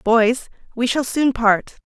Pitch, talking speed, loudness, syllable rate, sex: 240 Hz, 160 wpm, -19 LUFS, 3.6 syllables/s, female